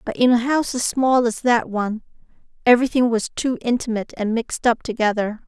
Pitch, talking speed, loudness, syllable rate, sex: 235 Hz, 185 wpm, -20 LUFS, 6.1 syllables/s, female